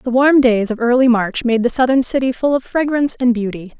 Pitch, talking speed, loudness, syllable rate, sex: 245 Hz, 235 wpm, -15 LUFS, 5.7 syllables/s, female